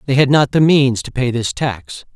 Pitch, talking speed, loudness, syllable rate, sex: 130 Hz, 250 wpm, -15 LUFS, 4.7 syllables/s, male